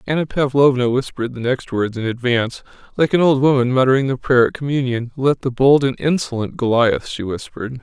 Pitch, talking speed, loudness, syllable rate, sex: 130 Hz, 190 wpm, -18 LUFS, 5.7 syllables/s, male